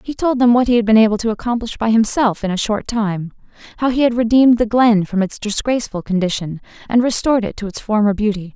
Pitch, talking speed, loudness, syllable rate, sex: 220 Hz, 230 wpm, -16 LUFS, 6.2 syllables/s, female